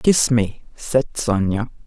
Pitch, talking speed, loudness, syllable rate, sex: 120 Hz, 130 wpm, -20 LUFS, 3.6 syllables/s, female